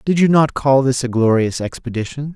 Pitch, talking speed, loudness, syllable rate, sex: 135 Hz, 205 wpm, -17 LUFS, 5.3 syllables/s, male